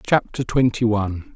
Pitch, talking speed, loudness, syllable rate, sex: 110 Hz, 135 wpm, -21 LUFS, 5.1 syllables/s, male